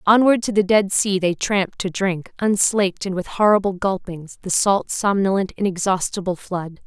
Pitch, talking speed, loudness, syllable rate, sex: 195 Hz, 165 wpm, -20 LUFS, 4.7 syllables/s, female